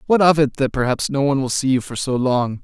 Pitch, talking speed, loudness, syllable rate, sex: 135 Hz, 295 wpm, -18 LUFS, 6.1 syllables/s, male